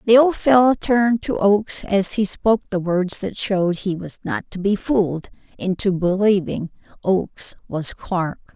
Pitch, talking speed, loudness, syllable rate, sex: 200 Hz, 170 wpm, -20 LUFS, 4.6 syllables/s, female